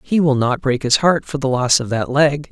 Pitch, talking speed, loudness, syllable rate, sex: 135 Hz, 285 wpm, -17 LUFS, 5.0 syllables/s, male